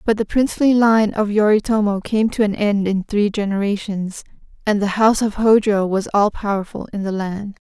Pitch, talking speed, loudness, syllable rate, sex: 210 Hz, 190 wpm, -18 LUFS, 5.1 syllables/s, female